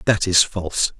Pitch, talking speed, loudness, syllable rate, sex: 90 Hz, 180 wpm, -18 LUFS, 4.8 syllables/s, male